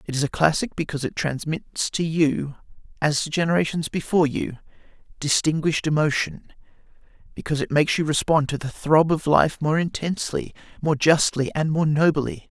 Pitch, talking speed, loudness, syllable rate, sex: 150 Hz, 155 wpm, -22 LUFS, 5.4 syllables/s, male